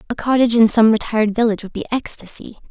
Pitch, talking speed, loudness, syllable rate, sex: 225 Hz, 200 wpm, -17 LUFS, 7.3 syllables/s, female